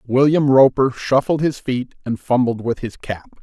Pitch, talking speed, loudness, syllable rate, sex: 130 Hz, 175 wpm, -18 LUFS, 4.6 syllables/s, male